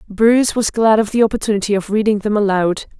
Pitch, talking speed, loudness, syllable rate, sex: 210 Hz, 200 wpm, -16 LUFS, 6.2 syllables/s, female